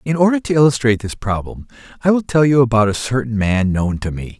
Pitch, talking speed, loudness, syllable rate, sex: 120 Hz, 230 wpm, -16 LUFS, 6.1 syllables/s, male